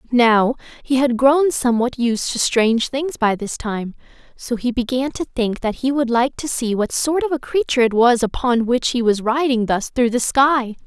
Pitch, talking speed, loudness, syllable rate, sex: 245 Hz, 215 wpm, -18 LUFS, 4.8 syllables/s, female